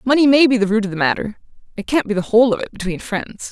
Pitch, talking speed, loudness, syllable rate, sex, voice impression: 220 Hz, 290 wpm, -17 LUFS, 6.9 syllables/s, female, feminine, adult-like, tensed, powerful, clear, fluent, intellectual, calm, reassuring, elegant, slightly sharp